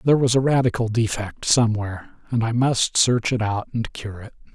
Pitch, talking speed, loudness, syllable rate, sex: 115 Hz, 200 wpm, -21 LUFS, 5.4 syllables/s, male